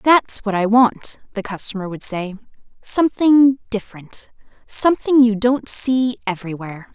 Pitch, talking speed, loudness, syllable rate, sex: 225 Hz, 110 wpm, -18 LUFS, 4.7 syllables/s, female